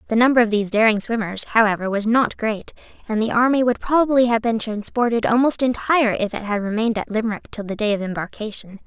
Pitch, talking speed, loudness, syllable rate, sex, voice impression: 225 Hz, 210 wpm, -20 LUFS, 6.3 syllables/s, female, gender-neutral, very young, very fluent, cute, refreshing, slightly unique, lively